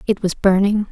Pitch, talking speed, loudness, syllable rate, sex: 200 Hz, 195 wpm, -17 LUFS, 5.2 syllables/s, female